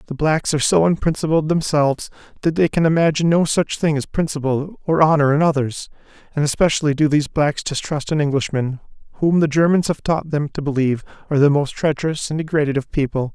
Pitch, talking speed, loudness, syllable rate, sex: 150 Hz, 195 wpm, -19 LUFS, 6.1 syllables/s, male